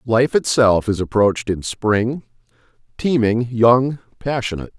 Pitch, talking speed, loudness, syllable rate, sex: 115 Hz, 115 wpm, -18 LUFS, 4.2 syllables/s, male